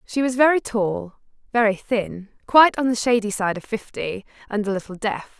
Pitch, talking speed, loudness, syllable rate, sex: 220 Hz, 190 wpm, -21 LUFS, 5.1 syllables/s, female